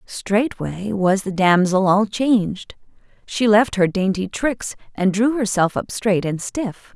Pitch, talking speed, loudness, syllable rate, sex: 205 Hz, 155 wpm, -19 LUFS, 3.7 syllables/s, female